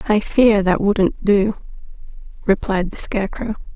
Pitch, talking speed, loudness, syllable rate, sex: 205 Hz, 130 wpm, -18 LUFS, 4.4 syllables/s, female